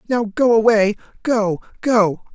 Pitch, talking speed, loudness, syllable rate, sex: 220 Hz, 100 wpm, -17 LUFS, 3.6 syllables/s, male